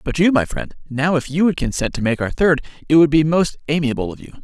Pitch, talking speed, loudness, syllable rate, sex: 150 Hz, 255 wpm, -18 LUFS, 6.0 syllables/s, male